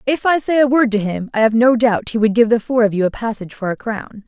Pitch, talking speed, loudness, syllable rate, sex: 230 Hz, 325 wpm, -16 LUFS, 6.1 syllables/s, female